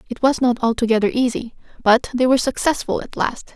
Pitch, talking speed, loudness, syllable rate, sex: 245 Hz, 185 wpm, -19 LUFS, 6.0 syllables/s, female